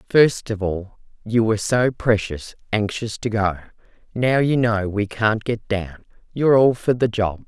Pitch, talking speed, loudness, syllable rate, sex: 110 Hz, 175 wpm, -20 LUFS, 4.3 syllables/s, female